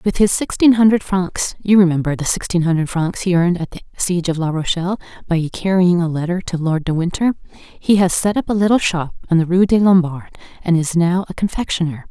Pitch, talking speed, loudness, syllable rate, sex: 175 Hz, 210 wpm, -17 LUFS, 5.7 syllables/s, female